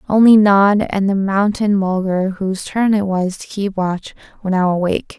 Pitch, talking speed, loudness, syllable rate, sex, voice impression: 195 Hz, 185 wpm, -16 LUFS, 4.9 syllables/s, female, very feminine, slightly young, slightly adult-like, very thin, slightly relaxed, slightly weak, bright, soft, clear, slightly fluent, slightly raspy, very cute, intellectual, refreshing, sincere, calm, very friendly, very reassuring, unique, elegant, wild, very sweet, slightly lively, kind, modest